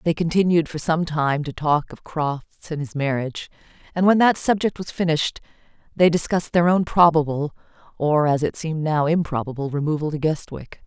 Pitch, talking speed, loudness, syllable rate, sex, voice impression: 155 Hz, 165 wpm, -21 LUFS, 5.4 syllables/s, female, very feminine, adult-like, slightly fluent, intellectual, slightly calm